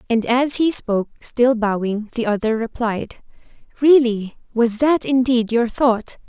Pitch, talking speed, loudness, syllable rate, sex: 235 Hz, 145 wpm, -18 LUFS, 4.1 syllables/s, female